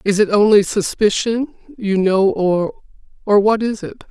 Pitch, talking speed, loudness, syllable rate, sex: 205 Hz, 145 wpm, -16 LUFS, 4.2 syllables/s, female